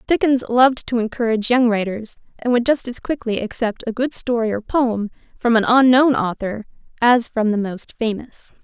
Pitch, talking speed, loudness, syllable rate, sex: 235 Hz, 180 wpm, -18 LUFS, 5.0 syllables/s, female